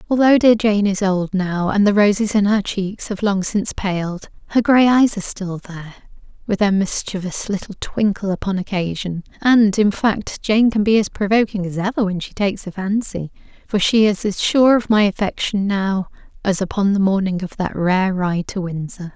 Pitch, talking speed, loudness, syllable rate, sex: 200 Hz, 195 wpm, -18 LUFS, 4.9 syllables/s, female